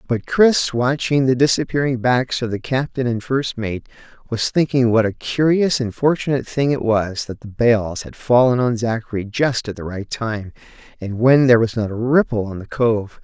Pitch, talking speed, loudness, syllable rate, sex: 120 Hz, 200 wpm, -18 LUFS, 4.9 syllables/s, male